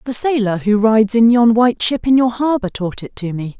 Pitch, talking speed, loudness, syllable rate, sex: 225 Hz, 250 wpm, -15 LUFS, 5.5 syllables/s, female